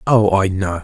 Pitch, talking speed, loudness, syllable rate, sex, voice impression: 100 Hz, 215 wpm, -16 LUFS, 4.4 syllables/s, male, masculine, adult-like, relaxed, slightly weak, soft, raspy, calm, slightly friendly, reassuring, slightly wild, kind, modest